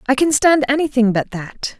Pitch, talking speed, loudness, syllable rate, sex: 260 Hz, 200 wpm, -16 LUFS, 5.0 syllables/s, female